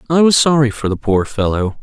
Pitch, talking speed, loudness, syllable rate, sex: 125 Hz, 230 wpm, -15 LUFS, 5.7 syllables/s, male